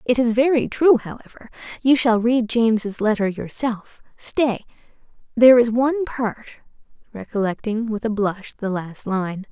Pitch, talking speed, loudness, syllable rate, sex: 225 Hz, 140 wpm, -20 LUFS, 4.7 syllables/s, female